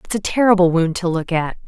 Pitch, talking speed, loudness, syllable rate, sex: 180 Hz, 250 wpm, -17 LUFS, 6.0 syllables/s, female